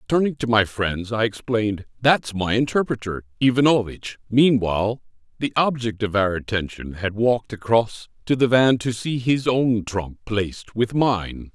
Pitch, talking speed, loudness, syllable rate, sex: 115 Hz, 155 wpm, -21 LUFS, 4.5 syllables/s, male